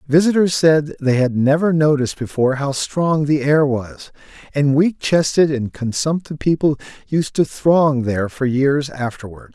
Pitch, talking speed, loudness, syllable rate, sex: 145 Hz, 155 wpm, -17 LUFS, 4.7 syllables/s, male